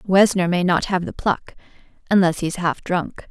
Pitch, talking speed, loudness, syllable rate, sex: 180 Hz, 200 wpm, -20 LUFS, 5.2 syllables/s, female